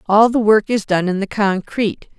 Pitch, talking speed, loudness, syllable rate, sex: 210 Hz, 220 wpm, -17 LUFS, 5.0 syllables/s, female